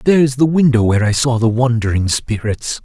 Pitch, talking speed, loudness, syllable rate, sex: 125 Hz, 190 wpm, -15 LUFS, 5.5 syllables/s, male